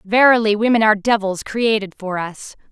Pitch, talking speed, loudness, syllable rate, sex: 215 Hz, 155 wpm, -17 LUFS, 5.3 syllables/s, female